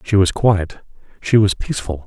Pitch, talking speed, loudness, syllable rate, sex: 95 Hz, 175 wpm, -17 LUFS, 5.0 syllables/s, male